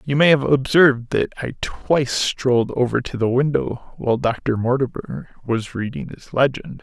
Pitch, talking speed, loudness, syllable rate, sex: 130 Hz, 165 wpm, -20 LUFS, 4.8 syllables/s, male